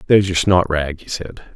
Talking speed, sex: 195 wpm, male